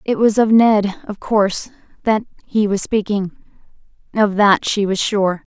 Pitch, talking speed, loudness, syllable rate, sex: 205 Hz, 160 wpm, -17 LUFS, 4.3 syllables/s, female